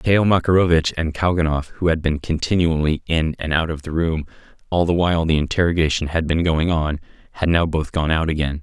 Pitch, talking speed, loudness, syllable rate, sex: 80 Hz, 200 wpm, -20 LUFS, 5.8 syllables/s, male